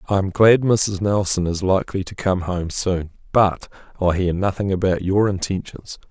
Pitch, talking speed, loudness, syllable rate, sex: 95 Hz, 175 wpm, -20 LUFS, 4.7 syllables/s, male